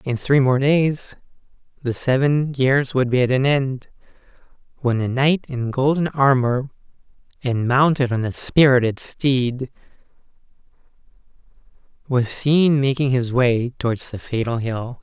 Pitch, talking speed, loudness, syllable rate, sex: 130 Hz, 130 wpm, -19 LUFS, 4.1 syllables/s, male